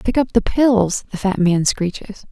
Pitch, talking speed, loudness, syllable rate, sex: 205 Hz, 210 wpm, -17 LUFS, 4.3 syllables/s, female